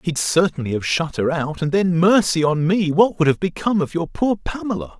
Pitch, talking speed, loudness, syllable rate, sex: 170 Hz, 230 wpm, -19 LUFS, 5.4 syllables/s, male